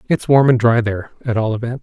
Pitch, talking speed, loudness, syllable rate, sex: 120 Hz, 265 wpm, -16 LUFS, 6.6 syllables/s, male